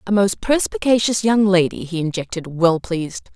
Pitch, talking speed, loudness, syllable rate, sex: 190 Hz, 160 wpm, -18 LUFS, 5.3 syllables/s, female